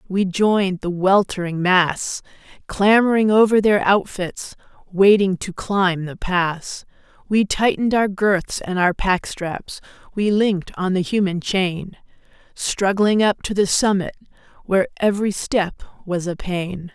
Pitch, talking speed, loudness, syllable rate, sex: 190 Hz, 140 wpm, -19 LUFS, 4.0 syllables/s, female